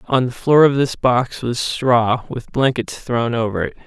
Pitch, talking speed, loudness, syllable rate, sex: 125 Hz, 200 wpm, -18 LUFS, 4.1 syllables/s, male